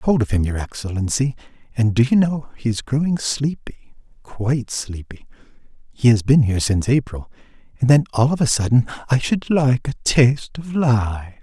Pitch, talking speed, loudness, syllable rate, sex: 125 Hz, 185 wpm, -19 LUFS, 5.3 syllables/s, male